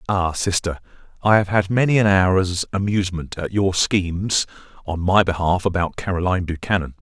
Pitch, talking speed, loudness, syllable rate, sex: 95 Hz, 155 wpm, -20 LUFS, 5.2 syllables/s, male